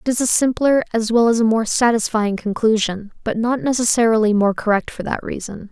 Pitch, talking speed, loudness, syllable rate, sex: 225 Hz, 200 wpm, -18 LUFS, 5.6 syllables/s, female